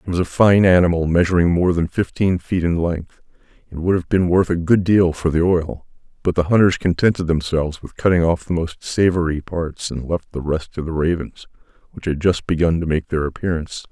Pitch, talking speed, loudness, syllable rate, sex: 85 Hz, 215 wpm, -19 LUFS, 5.5 syllables/s, male